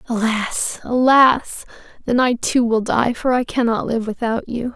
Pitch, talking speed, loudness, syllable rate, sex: 240 Hz, 165 wpm, -18 LUFS, 4.2 syllables/s, female